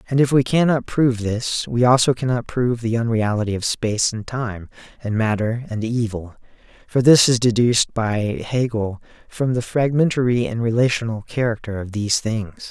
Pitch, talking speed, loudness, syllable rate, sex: 115 Hz, 165 wpm, -20 LUFS, 5.1 syllables/s, male